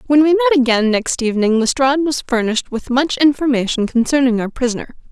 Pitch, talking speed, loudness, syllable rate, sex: 260 Hz, 175 wpm, -16 LUFS, 6.3 syllables/s, female